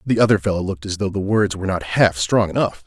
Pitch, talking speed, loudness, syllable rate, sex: 95 Hz, 275 wpm, -19 LUFS, 6.5 syllables/s, male